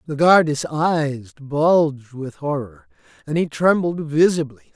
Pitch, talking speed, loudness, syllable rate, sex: 150 Hz, 125 wpm, -19 LUFS, 4.0 syllables/s, male